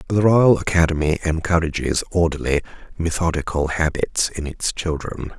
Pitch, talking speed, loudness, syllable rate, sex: 85 Hz, 110 wpm, -20 LUFS, 4.9 syllables/s, male